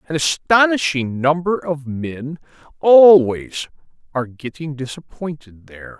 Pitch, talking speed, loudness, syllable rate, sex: 150 Hz, 100 wpm, -17 LUFS, 4.2 syllables/s, male